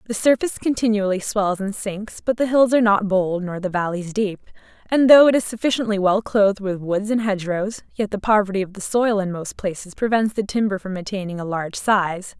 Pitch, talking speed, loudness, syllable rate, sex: 205 Hz, 215 wpm, -20 LUFS, 5.6 syllables/s, female